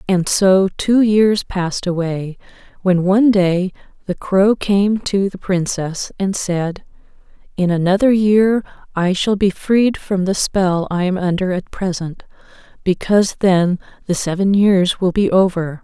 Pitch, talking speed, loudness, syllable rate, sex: 190 Hz, 150 wpm, -16 LUFS, 4.0 syllables/s, female